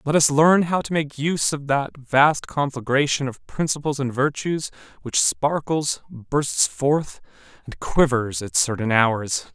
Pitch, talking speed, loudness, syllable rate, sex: 135 Hz, 150 wpm, -21 LUFS, 3.9 syllables/s, male